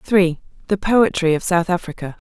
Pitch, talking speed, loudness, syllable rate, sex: 180 Hz, 160 wpm, -18 LUFS, 5.9 syllables/s, female